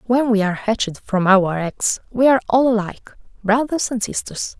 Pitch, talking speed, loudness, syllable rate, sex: 220 Hz, 185 wpm, -18 LUFS, 5.5 syllables/s, female